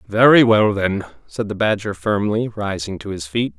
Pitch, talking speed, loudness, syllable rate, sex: 105 Hz, 185 wpm, -18 LUFS, 4.7 syllables/s, male